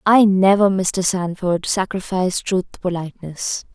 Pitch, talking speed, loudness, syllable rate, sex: 185 Hz, 130 wpm, -19 LUFS, 4.6 syllables/s, female